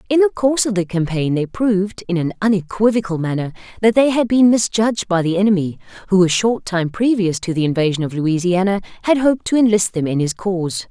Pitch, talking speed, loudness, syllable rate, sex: 195 Hz, 210 wpm, -17 LUFS, 6.0 syllables/s, female